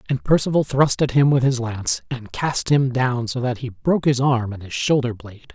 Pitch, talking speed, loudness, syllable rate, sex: 130 Hz, 240 wpm, -20 LUFS, 5.3 syllables/s, male